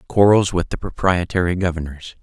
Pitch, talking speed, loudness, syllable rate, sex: 90 Hz, 135 wpm, -19 LUFS, 5.4 syllables/s, male